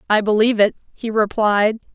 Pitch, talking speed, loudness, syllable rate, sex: 215 Hz, 155 wpm, -17 LUFS, 5.4 syllables/s, female